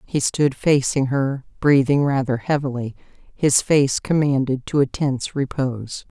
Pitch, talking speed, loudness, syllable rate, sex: 135 Hz, 135 wpm, -20 LUFS, 4.3 syllables/s, female